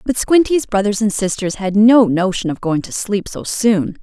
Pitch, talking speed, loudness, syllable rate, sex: 205 Hz, 210 wpm, -16 LUFS, 4.7 syllables/s, female